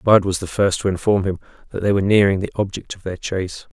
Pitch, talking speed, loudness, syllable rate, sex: 95 Hz, 255 wpm, -20 LUFS, 6.4 syllables/s, male